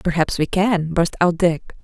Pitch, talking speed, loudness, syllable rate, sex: 175 Hz, 195 wpm, -19 LUFS, 4.3 syllables/s, female